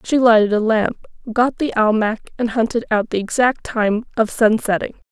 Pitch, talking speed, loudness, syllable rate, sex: 225 Hz, 175 wpm, -18 LUFS, 5.1 syllables/s, female